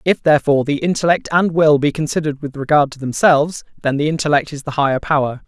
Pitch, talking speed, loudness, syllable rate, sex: 150 Hz, 210 wpm, -16 LUFS, 6.7 syllables/s, male